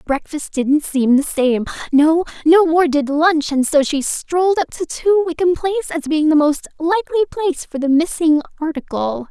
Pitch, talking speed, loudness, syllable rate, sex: 315 Hz, 180 wpm, -17 LUFS, 5.1 syllables/s, female